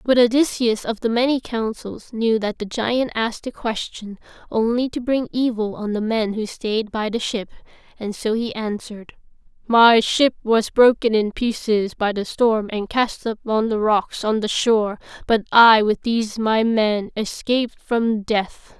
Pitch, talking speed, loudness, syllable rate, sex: 225 Hz, 180 wpm, -20 LUFS, 4.4 syllables/s, female